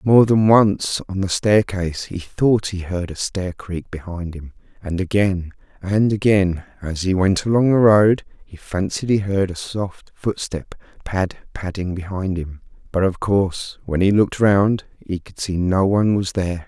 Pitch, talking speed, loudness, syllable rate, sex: 95 Hz, 180 wpm, -20 LUFS, 4.4 syllables/s, male